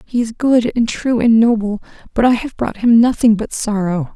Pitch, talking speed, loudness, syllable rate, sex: 230 Hz, 215 wpm, -15 LUFS, 4.9 syllables/s, female